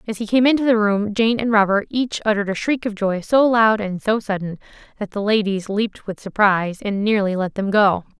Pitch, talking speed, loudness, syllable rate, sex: 210 Hz, 225 wpm, -19 LUFS, 5.5 syllables/s, female